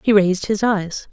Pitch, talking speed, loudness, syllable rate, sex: 200 Hz, 215 wpm, -18 LUFS, 5.0 syllables/s, female